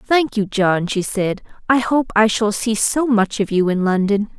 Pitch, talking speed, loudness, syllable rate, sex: 215 Hz, 220 wpm, -18 LUFS, 4.3 syllables/s, female